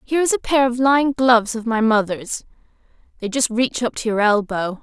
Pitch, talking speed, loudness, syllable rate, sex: 235 Hz, 210 wpm, -18 LUFS, 5.5 syllables/s, female